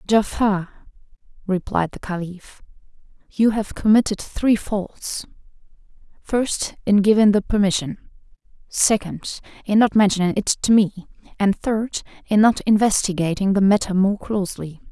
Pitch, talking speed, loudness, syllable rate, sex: 200 Hz, 115 wpm, -20 LUFS, 4.4 syllables/s, female